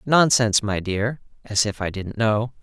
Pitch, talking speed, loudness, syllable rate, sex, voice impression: 110 Hz, 185 wpm, -21 LUFS, 4.6 syllables/s, male, masculine, adult-like, slightly soft, slightly clear, slightly intellectual, refreshing, kind